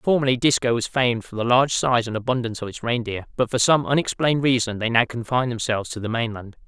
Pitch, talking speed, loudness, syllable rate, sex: 120 Hz, 225 wpm, -22 LUFS, 6.7 syllables/s, male